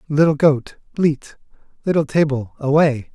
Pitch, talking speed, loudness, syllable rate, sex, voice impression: 145 Hz, 115 wpm, -18 LUFS, 4.4 syllables/s, male, masculine, middle-aged, slightly relaxed, bright, clear, raspy, cool, sincere, calm, friendly, reassuring, slightly lively, kind, modest